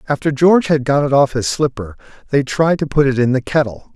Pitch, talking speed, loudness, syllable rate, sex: 140 Hz, 245 wpm, -15 LUFS, 5.9 syllables/s, male